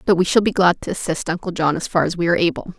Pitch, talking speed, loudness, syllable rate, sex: 175 Hz, 325 wpm, -19 LUFS, 7.1 syllables/s, female